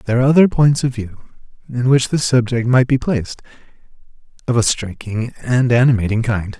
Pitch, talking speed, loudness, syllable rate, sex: 120 Hz, 175 wpm, -16 LUFS, 5.5 syllables/s, male